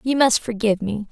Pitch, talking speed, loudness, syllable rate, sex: 225 Hz, 215 wpm, -20 LUFS, 5.9 syllables/s, female